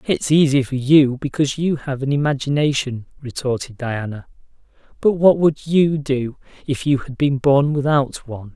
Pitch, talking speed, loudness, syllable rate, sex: 140 Hz, 160 wpm, -18 LUFS, 4.8 syllables/s, male